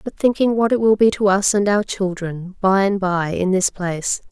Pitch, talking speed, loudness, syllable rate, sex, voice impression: 195 Hz, 235 wpm, -18 LUFS, 4.9 syllables/s, female, feminine, adult-like, tensed, powerful, slightly hard, clear, intellectual, calm, slightly friendly, elegant, slightly sharp